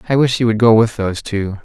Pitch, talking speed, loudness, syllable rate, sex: 110 Hz, 295 wpm, -15 LUFS, 6.3 syllables/s, male